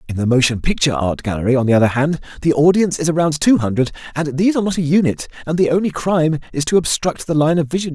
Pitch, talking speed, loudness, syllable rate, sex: 150 Hz, 250 wpm, -17 LUFS, 7.2 syllables/s, male